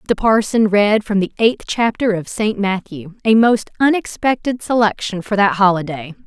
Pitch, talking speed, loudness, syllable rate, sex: 210 Hz, 165 wpm, -16 LUFS, 4.7 syllables/s, female